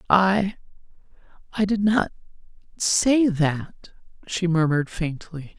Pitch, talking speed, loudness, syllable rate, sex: 180 Hz, 75 wpm, -22 LUFS, 3.5 syllables/s, female